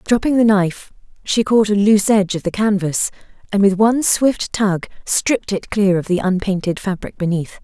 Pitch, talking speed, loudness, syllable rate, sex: 205 Hz, 190 wpm, -17 LUFS, 5.3 syllables/s, female